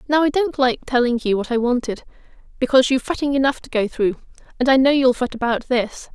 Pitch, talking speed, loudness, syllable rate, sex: 255 Hz, 225 wpm, -19 LUFS, 6.2 syllables/s, female